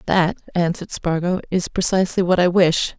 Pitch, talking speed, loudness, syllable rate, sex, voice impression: 180 Hz, 160 wpm, -19 LUFS, 5.5 syllables/s, female, feminine, slightly gender-neutral, slightly young, adult-like, slightly thin, slightly relaxed, slightly weak, slightly dark, soft, clear, slightly fluent, slightly cool, intellectual, sincere, calm, slightly friendly, slightly reassuring, slightly elegant, kind, modest